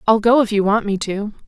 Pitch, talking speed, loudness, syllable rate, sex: 210 Hz, 285 wpm, -17 LUFS, 5.7 syllables/s, female